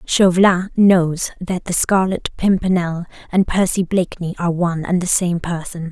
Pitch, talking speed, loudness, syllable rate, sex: 180 Hz, 150 wpm, -17 LUFS, 4.8 syllables/s, female